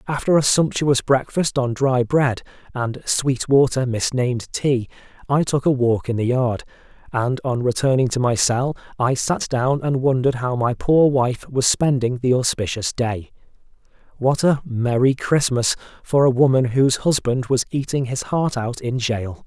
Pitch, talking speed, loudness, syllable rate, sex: 130 Hz, 170 wpm, -20 LUFS, 4.5 syllables/s, male